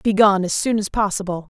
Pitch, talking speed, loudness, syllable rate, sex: 200 Hz, 190 wpm, -19 LUFS, 6.4 syllables/s, female